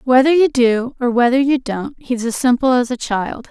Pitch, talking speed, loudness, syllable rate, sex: 250 Hz, 220 wpm, -16 LUFS, 4.8 syllables/s, female